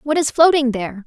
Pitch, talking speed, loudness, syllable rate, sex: 270 Hz, 225 wpm, -16 LUFS, 5.8 syllables/s, female